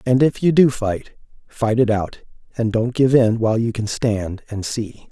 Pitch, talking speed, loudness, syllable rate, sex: 115 Hz, 210 wpm, -19 LUFS, 4.4 syllables/s, male